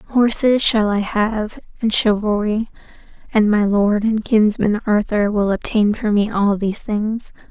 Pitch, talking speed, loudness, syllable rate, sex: 210 Hz, 150 wpm, -18 LUFS, 4.0 syllables/s, female